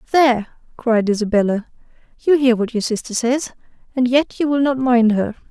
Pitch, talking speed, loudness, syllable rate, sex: 245 Hz, 175 wpm, -18 LUFS, 5.4 syllables/s, female